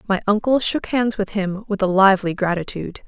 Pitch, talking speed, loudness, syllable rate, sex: 205 Hz, 195 wpm, -19 LUFS, 5.7 syllables/s, female